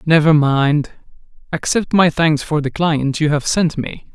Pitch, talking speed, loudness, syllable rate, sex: 155 Hz, 175 wpm, -16 LUFS, 4.3 syllables/s, male